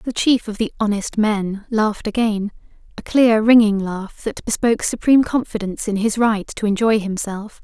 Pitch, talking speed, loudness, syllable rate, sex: 215 Hz, 175 wpm, -18 LUFS, 5.0 syllables/s, female